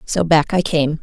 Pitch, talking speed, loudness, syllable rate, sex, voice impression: 155 Hz, 235 wpm, -16 LUFS, 4.3 syllables/s, female, feminine, adult-like, tensed, powerful, clear, slightly raspy, intellectual, elegant, lively, slightly strict, sharp